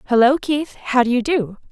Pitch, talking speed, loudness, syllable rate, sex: 255 Hz, 210 wpm, -18 LUFS, 5.2 syllables/s, female